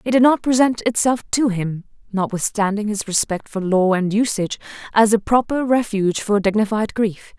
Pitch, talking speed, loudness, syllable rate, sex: 215 Hz, 170 wpm, -19 LUFS, 5.1 syllables/s, female